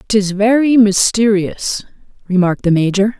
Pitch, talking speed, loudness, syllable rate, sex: 205 Hz, 115 wpm, -14 LUFS, 4.6 syllables/s, female